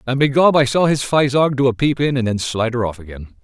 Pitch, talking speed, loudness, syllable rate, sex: 130 Hz, 260 wpm, -17 LUFS, 6.0 syllables/s, male